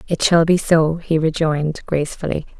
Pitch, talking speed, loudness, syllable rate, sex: 160 Hz, 160 wpm, -18 LUFS, 5.3 syllables/s, female